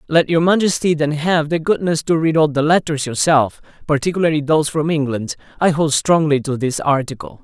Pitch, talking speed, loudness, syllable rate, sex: 150 Hz, 185 wpm, -17 LUFS, 5.5 syllables/s, male